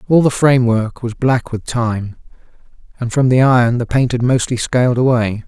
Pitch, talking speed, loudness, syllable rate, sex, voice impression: 120 Hz, 185 wpm, -15 LUFS, 5.2 syllables/s, male, masculine, adult-like, slightly fluent, slightly friendly, slightly unique